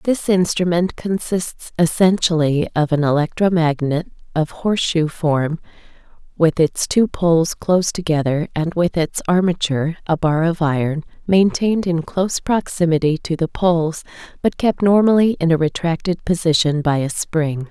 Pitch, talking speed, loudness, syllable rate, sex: 165 Hz, 140 wpm, -18 LUFS, 4.8 syllables/s, female